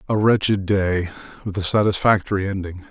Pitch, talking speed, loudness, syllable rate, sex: 95 Hz, 125 wpm, -20 LUFS, 5.1 syllables/s, male